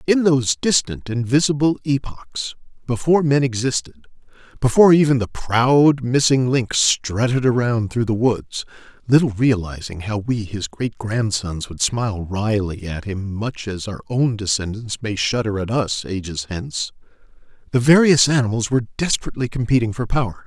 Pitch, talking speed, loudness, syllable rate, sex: 120 Hz, 145 wpm, -19 LUFS, 4.4 syllables/s, male